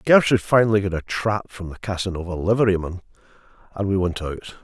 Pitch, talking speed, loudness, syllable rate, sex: 100 Hz, 170 wpm, -22 LUFS, 6.3 syllables/s, male